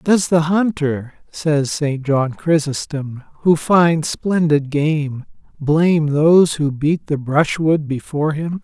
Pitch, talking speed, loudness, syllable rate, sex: 155 Hz, 130 wpm, -17 LUFS, 3.5 syllables/s, male